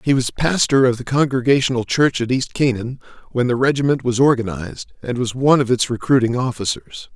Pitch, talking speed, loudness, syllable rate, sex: 125 Hz, 185 wpm, -18 LUFS, 5.7 syllables/s, male